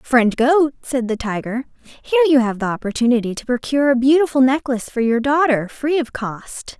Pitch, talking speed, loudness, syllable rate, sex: 260 Hz, 185 wpm, -18 LUFS, 5.3 syllables/s, female